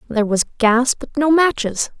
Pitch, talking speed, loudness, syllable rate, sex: 250 Hz, 180 wpm, -17 LUFS, 5.2 syllables/s, female